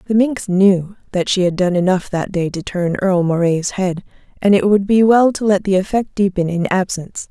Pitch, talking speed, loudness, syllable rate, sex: 190 Hz, 220 wpm, -16 LUFS, 5.2 syllables/s, female